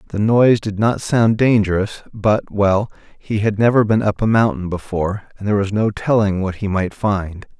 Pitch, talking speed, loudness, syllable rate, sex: 105 Hz, 190 wpm, -17 LUFS, 5.1 syllables/s, male